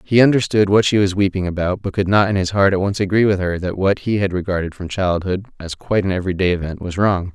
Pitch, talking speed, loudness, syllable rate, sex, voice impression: 95 Hz, 260 wpm, -18 LUFS, 6.3 syllables/s, male, masculine, very adult-like, cool, slightly intellectual, calm, slightly sweet